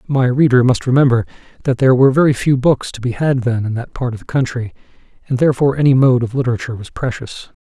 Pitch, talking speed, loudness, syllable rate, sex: 130 Hz, 220 wpm, -15 LUFS, 6.8 syllables/s, male